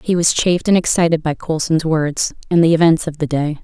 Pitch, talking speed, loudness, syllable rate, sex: 160 Hz, 230 wpm, -16 LUFS, 5.6 syllables/s, female